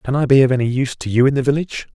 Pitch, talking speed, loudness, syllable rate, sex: 135 Hz, 330 wpm, -16 LUFS, 8.0 syllables/s, male